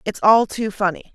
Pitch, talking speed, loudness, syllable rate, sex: 205 Hz, 210 wpm, -18 LUFS, 5.3 syllables/s, female